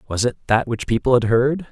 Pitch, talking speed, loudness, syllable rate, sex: 120 Hz, 245 wpm, -19 LUFS, 5.8 syllables/s, male